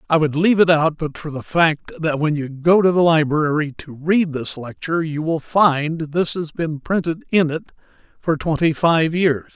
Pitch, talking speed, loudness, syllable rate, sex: 160 Hz, 205 wpm, -19 LUFS, 4.7 syllables/s, male